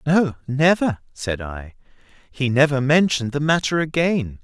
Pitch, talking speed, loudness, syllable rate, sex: 140 Hz, 120 wpm, -20 LUFS, 4.4 syllables/s, male